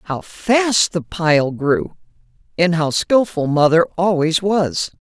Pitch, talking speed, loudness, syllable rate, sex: 175 Hz, 130 wpm, -17 LUFS, 3.3 syllables/s, female